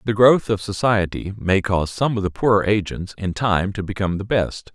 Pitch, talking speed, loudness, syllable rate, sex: 100 Hz, 215 wpm, -20 LUFS, 5.3 syllables/s, male